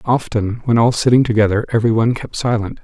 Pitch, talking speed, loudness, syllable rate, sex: 115 Hz, 170 wpm, -16 LUFS, 6.2 syllables/s, male